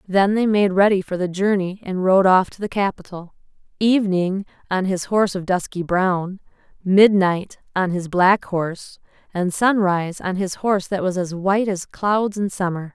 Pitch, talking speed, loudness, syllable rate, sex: 190 Hz, 170 wpm, -20 LUFS, 4.7 syllables/s, female